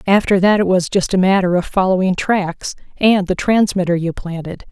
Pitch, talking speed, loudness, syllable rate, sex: 190 Hz, 180 wpm, -16 LUFS, 5.1 syllables/s, female